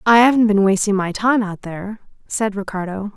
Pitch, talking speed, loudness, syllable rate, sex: 205 Hz, 190 wpm, -18 LUFS, 5.4 syllables/s, female